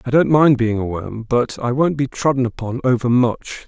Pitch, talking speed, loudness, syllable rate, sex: 125 Hz, 210 wpm, -18 LUFS, 4.9 syllables/s, male